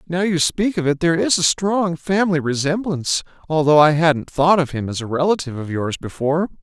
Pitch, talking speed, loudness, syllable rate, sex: 160 Hz, 210 wpm, -18 LUFS, 5.7 syllables/s, male